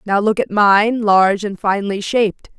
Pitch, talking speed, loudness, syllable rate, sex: 205 Hz, 185 wpm, -15 LUFS, 4.9 syllables/s, female